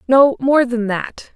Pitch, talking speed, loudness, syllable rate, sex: 250 Hz, 135 wpm, -16 LUFS, 3.5 syllables/s, female